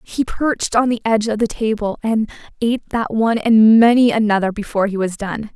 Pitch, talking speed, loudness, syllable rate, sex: 220 Hz, 205 wpm, -17 LUFS, 5.7 syllables/s, female